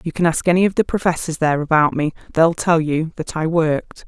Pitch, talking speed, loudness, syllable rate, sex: 160 Hz, 235 wpm, -18 LUFS, 5.9 syllables/s, female